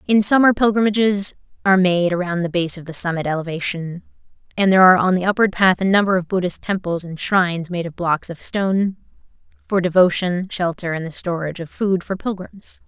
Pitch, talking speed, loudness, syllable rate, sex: 185 Hz, 190 wpm, -18 LUFS, 5.8 syllables/s, female